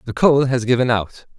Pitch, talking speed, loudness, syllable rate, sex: 125 Hz, 215 wpm, -17 LUFS, 5.2 syllables/s, male